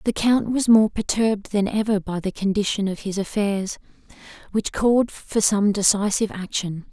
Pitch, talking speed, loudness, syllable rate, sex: 205 Hz, 165 wpm, -21 LUFS, 5.0 syllables/s, female